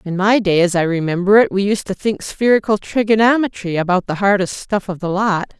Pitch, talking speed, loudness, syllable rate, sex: 195 Hz, 215 wpm, -16 LUFS, 5.5 syllables/s, female